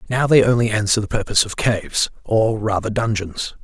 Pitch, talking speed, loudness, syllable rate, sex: 110 Hz, 180 wpm, -18 LUFS, 5.6 syllables/s, male